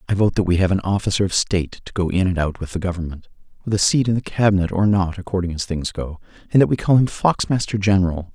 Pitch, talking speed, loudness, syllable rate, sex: 95 Hz, 250 wpm, -20 LUFS, 6.6 syllables/s, male